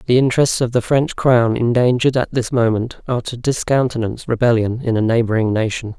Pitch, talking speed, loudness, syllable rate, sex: 120 Hz, 180 wpm, -17 LUFS, 5.9 syllables/s, male